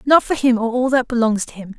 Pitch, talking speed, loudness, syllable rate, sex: 240 Hz, 305 wpm, -17 LUFS, 6.2 syllables/s, female